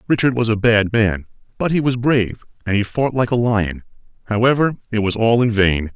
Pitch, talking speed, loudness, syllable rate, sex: 115 Hz, 210 wpm, -18 LUFS, 5.5 syllables/s, male